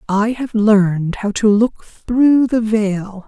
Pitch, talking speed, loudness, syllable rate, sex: 215 Hz, 165 wpm, -15 LUFS, 3.5 syllables/s, female